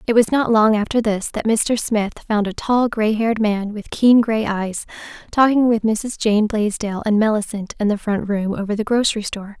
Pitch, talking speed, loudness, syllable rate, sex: 215 Hz, 215 wpm, -19 LUFS, 5.0 syllables/s, female